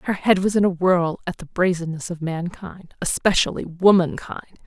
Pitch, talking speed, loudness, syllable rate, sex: 175 Hz, 165 wpm, -21 LUFS, 4.9 syllables/s, female